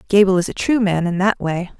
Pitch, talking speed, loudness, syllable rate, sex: 190 Hz, 265 wpm, -18 LUFS, 5.8 syllables/s, female